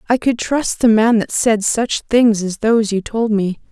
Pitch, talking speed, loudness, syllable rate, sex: 220 Hz, 225 wpm, -16 LUFS, 4.4 syllables/s, female